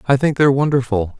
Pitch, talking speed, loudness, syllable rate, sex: 130 Hz, 200 wpm, -16 LUFS, 6.6 syllables/s, male